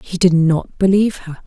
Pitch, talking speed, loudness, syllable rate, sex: 180 Hz, 205 wpm, -15 LUFS, 5.4 syllables/s, female